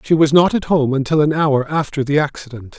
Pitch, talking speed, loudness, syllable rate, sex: 145 Hz, 235 wpm, -16 LUFS, 5.6 syllables/s, male